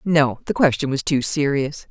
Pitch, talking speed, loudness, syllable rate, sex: 140 Hz, 155 wpm, -20 LUFS, 4.6 syllables/s, female